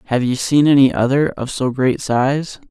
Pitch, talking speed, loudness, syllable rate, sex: 135 Hz, 200 wpm, -16 LUFS, 4.6 syllables/s, male